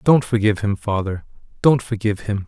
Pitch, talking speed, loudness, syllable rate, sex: 105 Hz, 170 wpm, -20 LUFS, 6.0 syllables/s, male